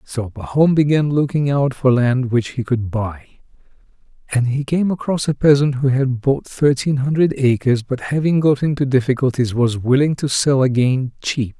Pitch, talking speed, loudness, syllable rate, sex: 130 Hz, 175 wpm, -17 LUFS, 4.8 syllables/s, male